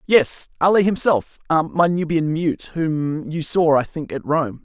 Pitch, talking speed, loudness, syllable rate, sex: 160 Hz, 170 wpm, -20 LUFS, 3.8 syllables/s, male